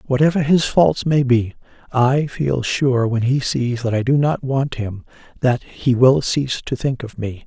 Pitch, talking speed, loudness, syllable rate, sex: 130 Hz, 200 wpm, -18 LUFS, 4.3 syllables/s, male